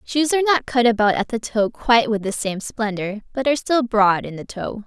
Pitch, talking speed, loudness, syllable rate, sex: 230 Hz, 245 wpm, -20 LUFS, 5.4 syllables/s, female